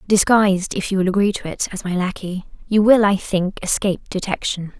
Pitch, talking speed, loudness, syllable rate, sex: 195 Hz, 200 wpm, -19 LUFS, 5.6 syllables/s, female